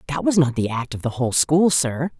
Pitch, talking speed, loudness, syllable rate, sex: 140 Hz, 300 wpm, -20 LUFS, 6.0 syllables/s, female